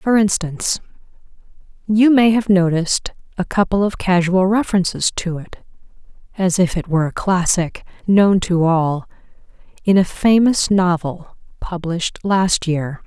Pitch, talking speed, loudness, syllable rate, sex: 185 Hz, 135 wpm, -17 LUFS, 4.5 syllables/s, female